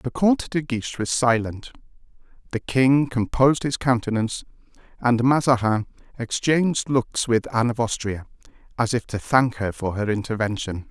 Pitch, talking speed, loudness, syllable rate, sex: 120 Hz, 150 wpm, -22 LUFS, 5.0 syllables/s, male